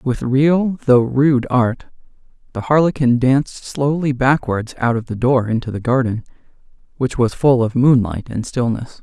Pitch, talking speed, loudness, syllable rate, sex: 130 Hz, 160 wpm, -17 LUFS, 4.4 syllables/s, male